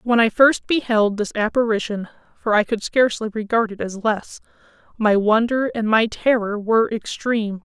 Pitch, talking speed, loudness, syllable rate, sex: 220 Hz, 150 wpm, -19 LUFS, 4.9 syllables/s, female